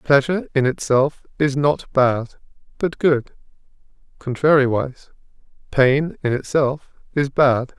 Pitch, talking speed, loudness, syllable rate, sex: 140 Hz, 110 wpm, -19 LUFS, 4.1 syllables/s, male